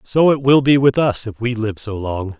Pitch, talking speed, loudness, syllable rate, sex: 120 Hz, 275 wpm, -17 LUFS, 4.8 syllables/s, male